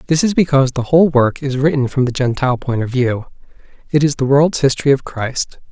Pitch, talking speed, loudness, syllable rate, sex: 135 Hz, 210 wpm, -16 LUFS, 6.0 syllables/s, male